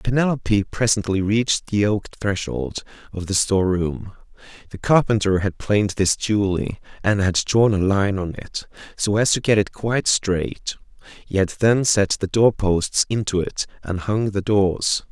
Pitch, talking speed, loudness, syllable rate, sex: 100 Hz, 170 wpm, -20 LUFS, 4.4 syllables/s, male